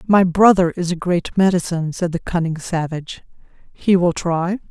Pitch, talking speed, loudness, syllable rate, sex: 175 Hz, 165 wpm, -18 LUFS, 5.0 syllables/s, female